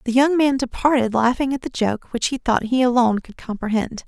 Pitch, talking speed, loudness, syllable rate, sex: 245 Hz, 220 wpm, -20 LUFS, 5.6 syllables/s, female